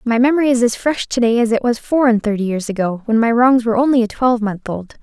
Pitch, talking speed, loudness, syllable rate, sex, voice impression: 235 Hz, 275 wpm, -16 LUFS, 6.4 syllables/s, female, feminine, slightly adult-like, cute, friendly, slightly sweet